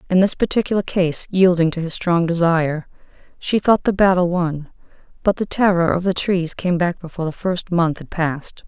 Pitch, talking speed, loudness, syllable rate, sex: 175 Hz, 195 wpm, -19 LUFS, 5.3 syllables/s, female